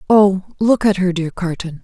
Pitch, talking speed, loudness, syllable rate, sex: 190 Hz, 195 wpm, -17 LUFS, 4.3 syllables/s, female